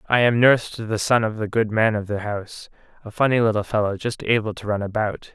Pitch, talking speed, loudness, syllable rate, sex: 110 Hz, 245 wpm, -21 LUFS, 6.0 syllables/s, male